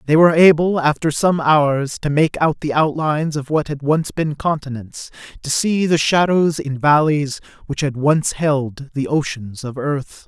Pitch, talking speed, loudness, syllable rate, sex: 150 Hz, 180 wpm, -17 LUFS, 4.3 syllables/s, male